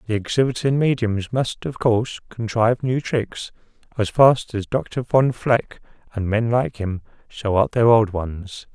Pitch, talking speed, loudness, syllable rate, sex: 115 Hz, 165 wpm, -20 LUFS, 4.3 syllables/s, male